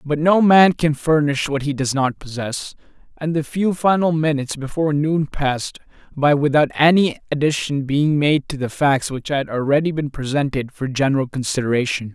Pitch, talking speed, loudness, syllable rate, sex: 145 Hz, 175 wpm, -19 LUFS, 5.1 syllables/s, male